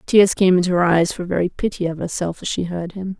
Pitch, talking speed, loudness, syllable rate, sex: 180 Hz, 265 wpm, -19 LUFS, 5.9 syllables/s, female